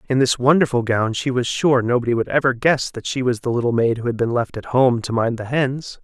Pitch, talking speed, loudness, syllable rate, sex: 125 Hz, 270 wpm, -19 LUFS, 5.6 syllables/s, male